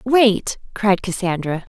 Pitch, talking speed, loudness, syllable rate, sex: 205 Hz, 100 wpm, -19 LUFS, 3.5 syllables/s, female